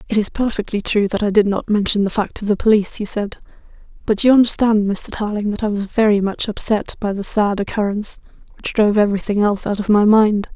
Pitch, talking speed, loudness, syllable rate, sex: 210 Hz, 220 wpm, -17 LUFS, 6.3 syllables/s, female